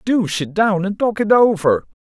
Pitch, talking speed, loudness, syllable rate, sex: 195 Hz, 210 wpm, -17 LUFS, 4.5 syllables/s, male